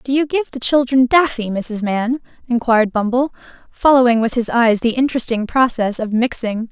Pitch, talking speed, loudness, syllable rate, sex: 240 Hz, 170 wpm, -16 LUFS, 5.2 syllables/s, female